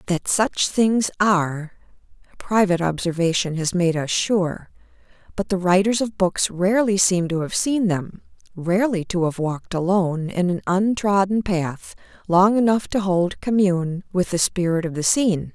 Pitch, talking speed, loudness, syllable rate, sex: 185 Hz, 160 wpm, -20 LUFS, 4.7 syllables/s, female